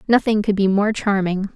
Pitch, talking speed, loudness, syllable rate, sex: 205 Hz, 195 wpm, -19 LUFS, 5.0 syllables/s, female